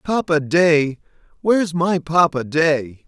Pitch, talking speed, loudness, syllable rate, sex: 160 Hz, 115 wpm, -18 LUFS, 3.5 syllables/s, male